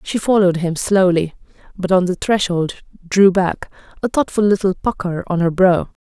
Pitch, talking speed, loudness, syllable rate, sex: 185 Hz, 165 wpm, -17 LUFS, 5.0 syllables/s, female